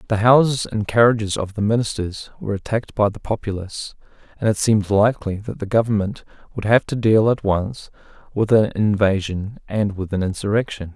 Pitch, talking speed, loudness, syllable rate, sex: 105 Hz, 175 wpm, -20 LUFS, 5.6 syllables/s, male